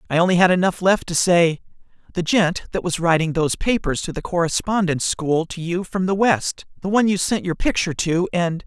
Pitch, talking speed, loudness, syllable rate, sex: 180 Hz, 215 wpm, -20 LUFS, 5.6 syllables/s, male